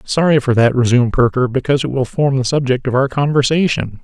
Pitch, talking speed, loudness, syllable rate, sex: 130 Hz, 210 wpm, -15 LUFS, 6.1 syllables/s, male